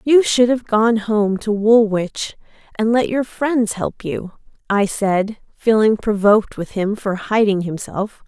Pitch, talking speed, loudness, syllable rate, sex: 215 Hz, 160 wpm, -18 LUFS, 3.8 syllables/s, female